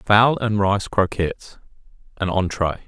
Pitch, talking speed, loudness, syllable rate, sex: 100 Hz, 125 wpm, -20 LUFS, 4.2 syllables/s, male